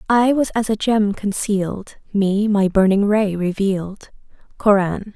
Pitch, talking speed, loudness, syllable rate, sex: 200 Hz, 140 wpm, -18 LUFS, 4.1 syllables/s, female